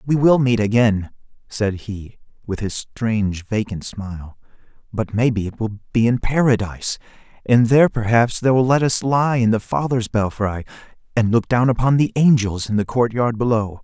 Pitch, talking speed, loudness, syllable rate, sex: 115 Hz, 180 wpm, -19 LUFS, 4.9 syllables/s, male